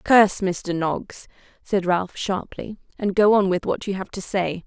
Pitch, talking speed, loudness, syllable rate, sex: 190 Hz, 195 wpm, -22 LUFS, 4.3 syllables/s, female